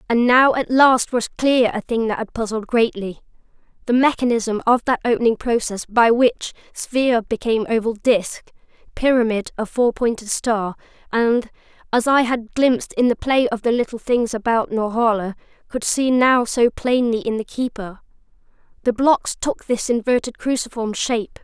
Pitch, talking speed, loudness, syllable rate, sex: 235 Hz, 155 wpm, -19 LUFS, 4.8 syllables/s, female